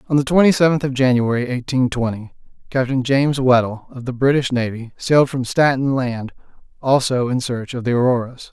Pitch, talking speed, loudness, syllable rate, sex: 130 Hz, 175 wpm, -18 LUFS, 5.6 syllables/s, male